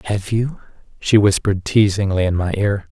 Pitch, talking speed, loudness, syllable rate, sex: 100 Hz, 160 wpm, -18 LUFS, 4.9 syllables/s, male